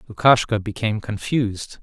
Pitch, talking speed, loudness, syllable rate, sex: 105 Hz, 100 wpm, -21 LUFS, 5.4 syllables/s, male